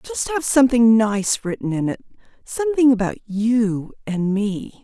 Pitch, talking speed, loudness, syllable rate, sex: 230 Hz, 135 wpm, -19 LUFS, 4.6 syllables/s, female